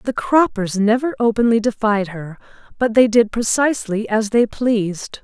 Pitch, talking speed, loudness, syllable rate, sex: 225 Hz, 150 wpm, -17 LUFS, 4.7 syllables/s, female